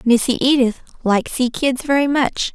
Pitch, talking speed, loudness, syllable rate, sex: 255 Hz, 165 wpm, -17 LUFS, 4.5 syllables/s, female